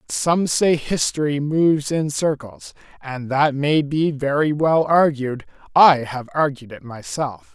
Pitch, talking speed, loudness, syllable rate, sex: 145 Hz, 150 wpm, -19 LUFS, 4.0 syllables/s, male